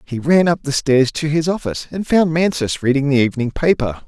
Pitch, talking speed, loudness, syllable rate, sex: 145 Hz, 220 wpm, -17 LUFS, 5.6 syllables/s, male